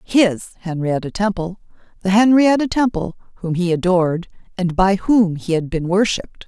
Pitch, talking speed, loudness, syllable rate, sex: 190 Hz, 150 wpm, -18 LUFS, 4.9 syllables/s, female